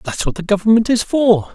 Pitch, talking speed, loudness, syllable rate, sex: 200 Hz, 235 wpm, -15 LUFS, 5.7 syllables/s, male